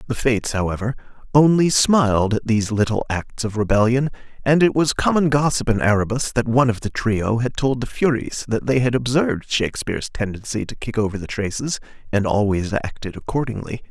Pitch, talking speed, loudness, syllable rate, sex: 115 Hz, 180 wpm, -20 LUFS, 5.7 syllables/s, male